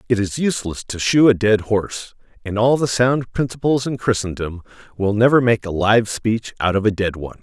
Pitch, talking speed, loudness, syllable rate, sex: 110 Hz, 210 wpm, -18 LUFS, 5.4 syllables/s, male